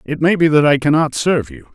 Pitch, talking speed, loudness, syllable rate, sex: 145 Hz, 310 wpm, -14 LUFS, 6.3 syllables/s, male